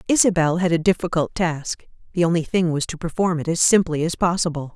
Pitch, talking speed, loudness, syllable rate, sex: 170 Hz, 190 wpm, -20 LUFS, 5.8 syllables/s, female